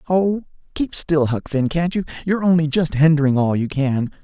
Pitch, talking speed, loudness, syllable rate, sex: 155 Hz, 200 wpm, -19 LUFS, 5.2 syllables/s, male